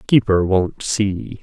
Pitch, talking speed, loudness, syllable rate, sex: 100 Hz, 125 wpm, -18 LUFS, 3.1 syllables/s, male